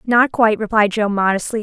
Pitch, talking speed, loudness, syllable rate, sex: 215 Hz, 185 wpm, -16 LUFS, 5.8 syllables/s, female